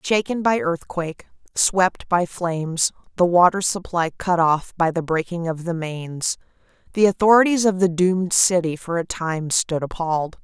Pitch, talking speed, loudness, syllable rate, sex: 175 Hz, 160 wpm, -20 LUFS, 4.5 syllables/s, female